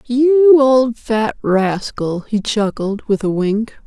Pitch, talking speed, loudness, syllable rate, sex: 230 Hz, 140 wpm, -15 LUFS, 3.1 syllables/s, female